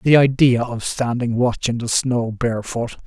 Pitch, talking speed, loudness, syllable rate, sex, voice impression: 120 Hz, 175 wpm, -19 LUFS, 4.4 syllables/s, male, masculine, middle-aged, powerful, slightly hard, slightly muffled, slightly halting, slightly sincere, slightly mature, wild, kind, modest